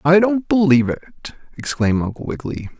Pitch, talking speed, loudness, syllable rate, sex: 155 Hz, 150 wpm, -18 LUFS, 6.0 syllables/s, male